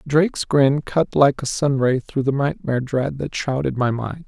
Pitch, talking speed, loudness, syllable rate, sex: 135 Hz, 195 wpm, -20 LUFS, 4.6 syllables/s, male